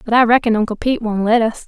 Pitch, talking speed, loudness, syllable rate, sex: 225 Hz, 285 wpm, -16 LUFS, 7.0 syllables/s, female